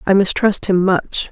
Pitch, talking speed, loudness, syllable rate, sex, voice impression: 190 Hz, 185 wpm, -16 LUFS, 4.2 syllables/s, female, feminine, adult-like, weak, soft, fluent, intellectual, calm, reassuring, elegant, kind, modest